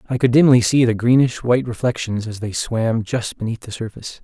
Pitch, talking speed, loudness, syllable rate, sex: 115 Hz, 215 wpm, -18 LUFS, 5.7 syllables/s, male